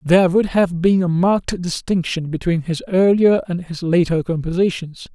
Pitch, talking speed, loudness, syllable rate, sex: 175 Hz, 165 wpm, -18 LUFS, 4.9 syllables/s, male